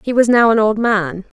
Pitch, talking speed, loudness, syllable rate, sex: 215 Hz, 260 wpm, -14 LUFS, 5.1 syllables/s, female